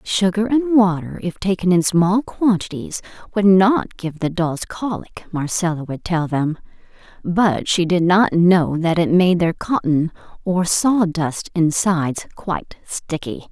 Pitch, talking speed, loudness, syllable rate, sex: 180 Hz, 145 wpm, -18 LUFS, 4.0 syllables/s, female